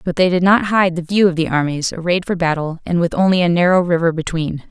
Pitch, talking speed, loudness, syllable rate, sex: 175 Hz, 255 wpm, -16 LUFS, 6.0 syllables/s, female